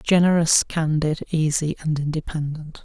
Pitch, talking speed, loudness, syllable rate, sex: 155 Hz, 105 wpm, -21 LUFS, 4.4 syllables/s, male